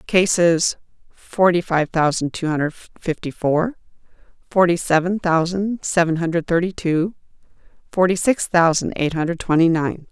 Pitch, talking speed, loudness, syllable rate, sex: 170 Hz, 130 wpm, -19 LUFS, 4.7 syllables/s, female